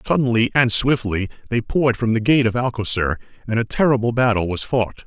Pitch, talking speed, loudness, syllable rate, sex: 115 Hz, 190 wpm, -19 LUFS, 5.7 syllables/s, male